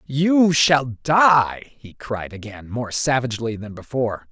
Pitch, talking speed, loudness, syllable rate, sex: 125 Hz, 140 wpm, -19 LUFS, 3.8 syllables/s, male